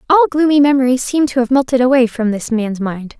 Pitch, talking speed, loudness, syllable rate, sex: 255 Hz, 225 wpm, -14 LUFS, 6.3 syllables/s, female